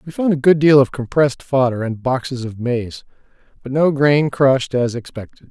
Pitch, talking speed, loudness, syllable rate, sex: 135 Hz, 195 wpm, -17 LUFS, 5.4 syllables/s, male